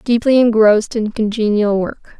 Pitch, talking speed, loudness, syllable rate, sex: 220 Hz, 135 wpm, -14 LUFS, 4.8 syllables/s, female